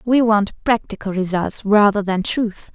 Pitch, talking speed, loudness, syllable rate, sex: 210 Hz, 155 wpm, -18 LUFS, 4.2 syllables/s, female